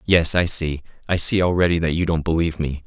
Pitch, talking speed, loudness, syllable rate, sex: 85 Hz, 230 wpm, -19 LUFS, 6.0 syllables/s, male